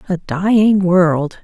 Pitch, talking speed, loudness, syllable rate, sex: 180 Hz, 125 wpm, -14 LUFS, 3.2 syllables/s, female